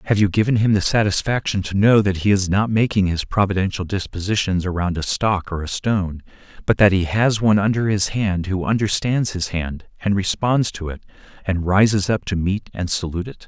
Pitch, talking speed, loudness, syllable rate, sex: 100 Hz, 205 wpm, -19 LUFS, 5.5 syllables/s, male